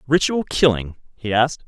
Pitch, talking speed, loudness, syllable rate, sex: 130 Hz, 145 wpm, -19 LUFS, 5.1 syllables/s, male